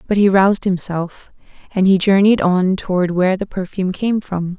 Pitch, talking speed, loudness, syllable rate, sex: 190 Hz, 185 wpm, -16 LUFS, 5.2 syllables/s, female